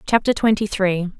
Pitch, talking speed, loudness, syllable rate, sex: 200 Hz, 150 wpm, -19 LUFS, 5.1 syllables/s, female